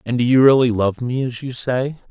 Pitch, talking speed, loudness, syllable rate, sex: 125 Hz, 255 wpm, -17 LUFS, 5.2 syllables/s, male